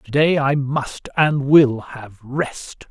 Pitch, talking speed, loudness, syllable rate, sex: 135 Hz, 165 wpm, -18 LUFS, 2.9 syllables/s, male